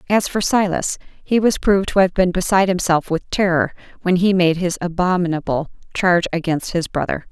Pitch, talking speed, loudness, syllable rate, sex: 180 Hz, 180 wpm, -18 LUFS, 5.6 syllables/s, female